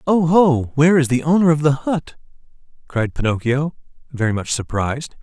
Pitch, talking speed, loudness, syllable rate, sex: 140 Hz, 150 wpm, -18 LUFS, 5.3 syllables/s, male